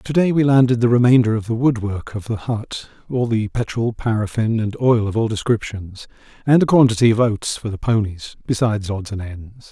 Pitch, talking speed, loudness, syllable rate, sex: 115 Hz, 205 wpm, -18 LUFS, 5.4 syllables/s, male